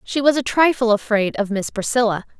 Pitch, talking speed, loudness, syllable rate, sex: 235 Hz, 200 wpm, -19 LUFS, 5.5 syllables/s, female